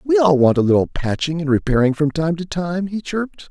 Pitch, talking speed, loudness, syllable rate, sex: 160 Hz, 240 wpm, -18 LUFS, 5.6 syllables/s, male